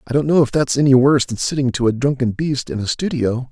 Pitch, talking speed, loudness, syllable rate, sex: 130 Hz, 275 wpm, -17 LUFS, 6.2 syllables/s, male